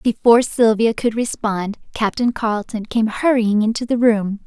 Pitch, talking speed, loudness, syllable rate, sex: 225 Hz, 150 wpm, -18 LUFS, 4.8 syllables/s, female